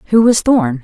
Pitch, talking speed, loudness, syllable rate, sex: 195 Hz, 215 wpm, -12 LUFS, 5.1 syllables/s, female